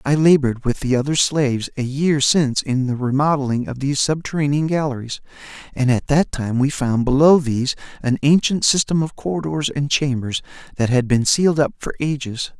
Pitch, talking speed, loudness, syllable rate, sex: 140 Hz, 180 wpm, -19 LUFS, 5.5 syllables/s, male